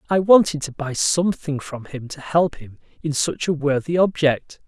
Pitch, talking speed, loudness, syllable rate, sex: 150 Hz, 190 wpm, -20 LUFS, 4.7 syllables/s, male